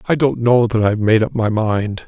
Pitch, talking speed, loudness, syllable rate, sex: 115 Hz, 260 wpm, -16 LUFS, 5.3 syllables/s, male